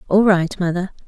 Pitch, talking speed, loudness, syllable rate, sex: 185 Hz, 165 wpm, -18 LUFS, 5.1 syllables/s, female